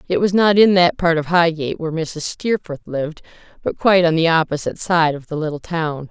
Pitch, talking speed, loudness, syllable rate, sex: 165 Hz, 215 wpm, -18 LUFS, 5.8 syllables/s, female